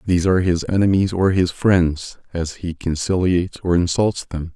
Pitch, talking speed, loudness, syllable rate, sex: 90 Hz, 170 wpm, -19 LUFS, 5.0 syllables/s, male